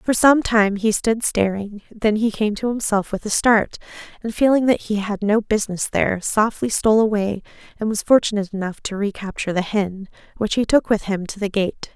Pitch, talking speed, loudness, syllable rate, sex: 210 Hz, 205 wpm, -20 LUFS, 5.3 syllables/s, female